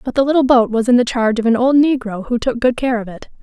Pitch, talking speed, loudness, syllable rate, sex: 240 Hz, 315 wpm, -15 LUFS, 6.5 syllables/s, female